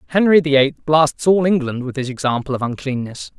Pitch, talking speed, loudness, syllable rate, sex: 145 Hz, 195 wpm, -17 LUFS, 5.5 syllables/s, male